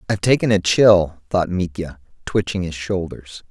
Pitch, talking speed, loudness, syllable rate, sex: 90 Hz, 155 wpm, -18 LUFS, 4.8 syllables/s, male